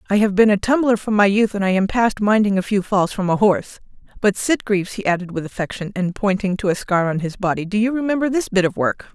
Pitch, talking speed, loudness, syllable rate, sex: 205 Hz, 265 wpm, -19 LUFS, 6.2 syllables/s, female